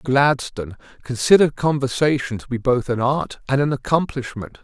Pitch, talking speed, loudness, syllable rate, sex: 130 Hz, 140 wpm, -20 LUFS, 5.3 syllables/s, male